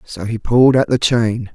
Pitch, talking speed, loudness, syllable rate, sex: 115 Hz, 235 wpm, -15 LUFS, 4.8 syllables/s, male